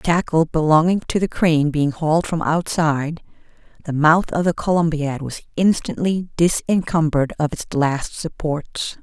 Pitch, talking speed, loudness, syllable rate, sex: 160 Hz, 145 wpm, -19 LUFS, 4.8 syllables/s, female